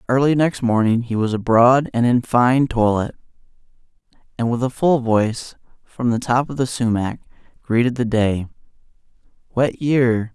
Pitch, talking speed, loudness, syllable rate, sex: 120 Hz, 145 wpm, -18 LUFS, 4.6 syllables/s, male